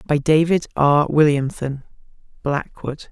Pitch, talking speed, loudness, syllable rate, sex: 150 Hz, 95 wpm, -19 LUFS, 4.4 syllables/s, female